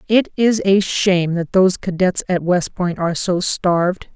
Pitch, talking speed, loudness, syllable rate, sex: 185 Hz, 190 wpm, -17 LUFS, 4.7 syllables/s, female